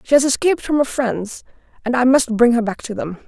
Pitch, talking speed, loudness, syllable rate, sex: 250 Hz, 255 wpm, -17 LUFS, 5.9 syllables/s, female